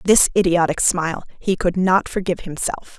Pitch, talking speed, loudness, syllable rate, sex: 180 Hz, 160 wpm, -19 LUFS, 5.3 syllables/s, female